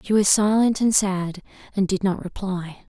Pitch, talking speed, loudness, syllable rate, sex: 195 Hz, 185 wpm, -21 LUFS, 4.5 syllables/s, female